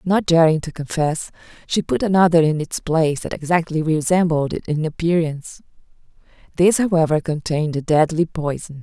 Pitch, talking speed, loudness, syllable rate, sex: 160 Hz, 150 wpm, -19 LUFS, 5.4 syllables/s, female